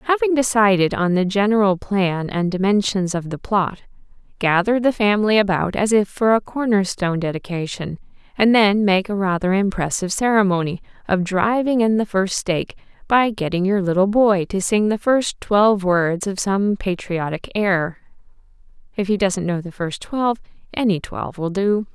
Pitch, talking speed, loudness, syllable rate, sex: 200 Hz, 165 wpm, -19 LUFS, 4.9 syllables/s, female